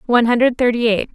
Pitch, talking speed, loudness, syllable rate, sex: 235 Hz, 210 wpm, -16 LUFS, 7.1 syllables/s, female